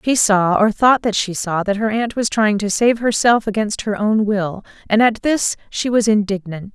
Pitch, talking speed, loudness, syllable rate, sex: 215 Hz, 220 wpm, -17 LUFS, 4.6 syllables/s, female